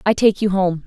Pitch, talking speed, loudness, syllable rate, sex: 190 Hz, 275 wpm, -17 LUFS, 5.2 syllables/s, female